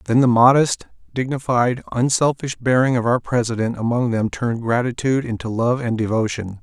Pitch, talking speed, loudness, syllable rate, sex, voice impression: 120 Hz, 155 wpm, -19 LUFS, 5.4 syllables/s, male, masculine, middle-aged, tensed, slightly powerful, slightly dark, slightly hard, cool, sincere, calm, mature, reassuring, wild, kind, slightly modest